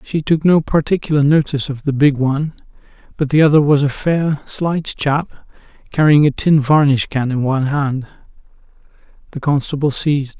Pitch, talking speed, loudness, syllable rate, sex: 145 Hz, 160 wpm, -16 LUFS, 5.2 syllables/s, male